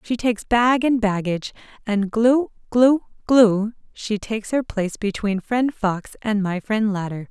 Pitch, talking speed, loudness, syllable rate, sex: 220 Hz, 165 wpm, -21 LUFS, 4.4 syllables/s, female